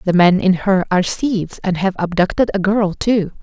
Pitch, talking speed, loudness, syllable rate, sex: 190 Hz, 210 wpm, -16 LUFS, 5.1 syllables/s, female